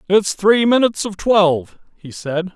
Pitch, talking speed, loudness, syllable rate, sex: 195 Hz, 165 wpm, -16 LUFS, 4.6 syllables/s, male